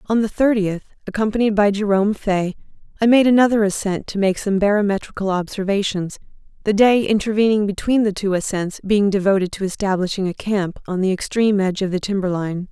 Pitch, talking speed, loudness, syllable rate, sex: 200 Hz, 170 wpm, -19 LUFS, 6.0 syllables/s, female